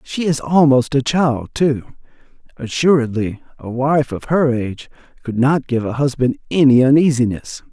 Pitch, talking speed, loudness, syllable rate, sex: 135 Hz, 150 wpm, -16 LUFS, 4.7 syllables/s, male